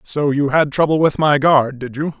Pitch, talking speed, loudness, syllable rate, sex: 145 Hz, 245 wpm, -16 LUFS, 4.8 syllables/s, male